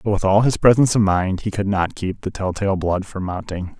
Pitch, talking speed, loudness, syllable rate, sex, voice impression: 100 Hz, 270 wpm, -19 LUFS, 5.3 syllables/s, male, masculine, adult-like, relaxed, slightly dark, muffled, slightly raspy, intellectual, calm, wild, slightly strict, slightly modest